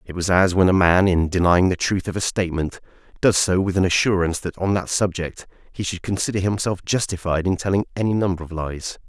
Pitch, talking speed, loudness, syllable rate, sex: 90 Hz, 220 wpm, -21 LUFS, 5.9 syllables/s, male